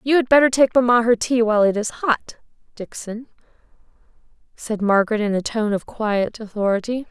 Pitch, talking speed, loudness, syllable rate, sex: 225 Hz, 170 wpm, -19 LUFS, 5.4 syllables/s, female